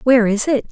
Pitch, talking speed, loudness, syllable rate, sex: 240 Hz, 255 wpm, -16 LUFS, 6.8 syllables/s, female